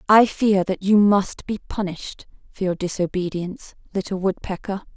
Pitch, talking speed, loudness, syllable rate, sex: 190 Hz, 145 wpm, -22 LUFS, 5.0 syllables/s, female